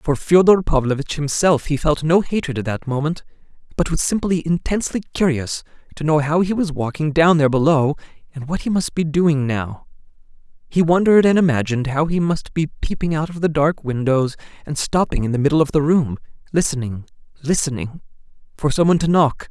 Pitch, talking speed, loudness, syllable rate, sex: 155 Hz, 185 wpm, -19 LUFS, 5.7 syllables/s, male